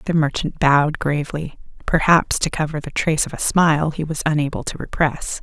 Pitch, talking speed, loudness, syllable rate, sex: 155 Hz, 190 wpm, -19 LUFS, 5.6 syllables/s, female